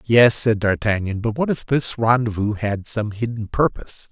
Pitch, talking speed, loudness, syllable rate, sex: 115 Hz, 175 wpm, -20 LUFS, 4.7 syllables/s, male